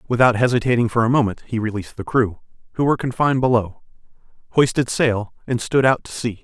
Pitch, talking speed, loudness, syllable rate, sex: 120 Hz, 185 wpm, -19 LUFS, 6.4 syllables/s, male